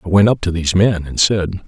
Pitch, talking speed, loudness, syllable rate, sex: 90 Hz, 285 wpm, -15 LUFS, 6.3 syllables/s, male